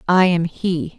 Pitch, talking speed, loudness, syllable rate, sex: 175 Hz, 185 wpm, -18 LUFS, 3.6 syllables/s, female